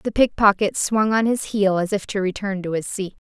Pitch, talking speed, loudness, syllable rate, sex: 200 Hz, 240 wpm, -21 LUFS, 5.1 syllables/s, female